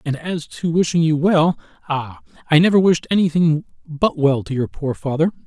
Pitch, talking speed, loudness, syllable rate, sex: 155 Hz, 175 wpm, -18 LUFS, 5.0 syllables/s, male